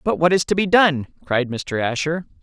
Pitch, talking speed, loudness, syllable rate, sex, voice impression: 160 Hz, 225 wpm, -19 LUFS, 5.0 syllables/s, male, very masculine, adult-like, middle-aged, slightly thick, tensed, powerful, very bright, slightly soft, very clear, fluent, cool, very intellectual, very refreshing, slightly sincere, slightly calm, slightly mature, friendly, very reassuring, very unique, very elegant, sweet, very lively, kind, intense, very light